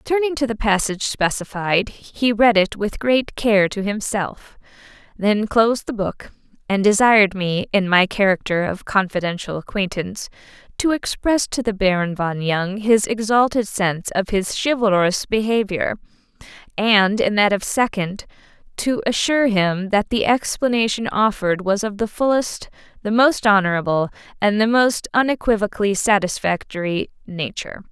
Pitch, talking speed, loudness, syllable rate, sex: 210 Hz, 140 wpm, -19 LUFS, 4.8 syllables/s, female